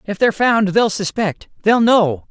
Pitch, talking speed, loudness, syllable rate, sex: 205 Hz, 155 wpm, -16 LUFS, 4.4 syllables/s, male